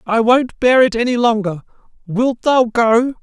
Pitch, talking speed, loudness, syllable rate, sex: 235 Hz, 170 wpm, -15 LUFS, 4.3 syllables/s, male